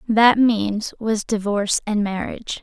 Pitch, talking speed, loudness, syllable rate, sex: 210 Hz, 135 wpm, -20 LUFS, 4.2 syllables/s, female